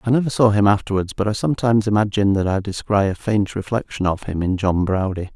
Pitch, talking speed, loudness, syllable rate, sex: 100 Hz, 225 wpm, -19 LUFS, 6.3 syllables/s, male